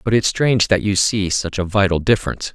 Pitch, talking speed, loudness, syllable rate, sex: 100 Hz, 235 wpm, -17 LUFS, 6.1 syllables/s, male